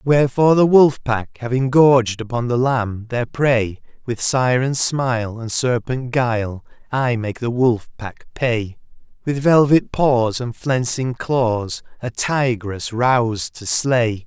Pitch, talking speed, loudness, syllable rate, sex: 125 Hz, 145 wpm, -18 LUFS, 3.8 syllables/s, male